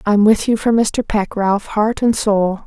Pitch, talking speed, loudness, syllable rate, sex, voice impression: 210 Hz, 225 wpm, -16 LUFS, 4.0 syllables/s, female, feminine, adult-like, slightly soft, calm, slightly elegant